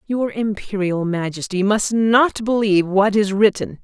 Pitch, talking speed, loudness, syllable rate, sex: 205 Hz, 140 wpm, -18 LUFS, 4.3 syllables/s, female